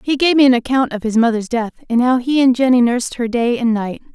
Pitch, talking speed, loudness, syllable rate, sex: 245 Hz, 275 wpm, -15 LUFS, 6.1 syllables/s, female